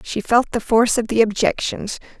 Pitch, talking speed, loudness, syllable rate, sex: 220 Hz, 190 wpm, -18 LUFS, 5.5 syllables/s, female